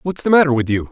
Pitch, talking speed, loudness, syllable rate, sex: 140 Hz, 330 wpm, -15 LUFS, 6.9 syllables/s, male